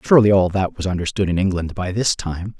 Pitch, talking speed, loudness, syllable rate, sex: 95 Hz, 230 wpm, -19 LUFS, 6.1 syllables/s, male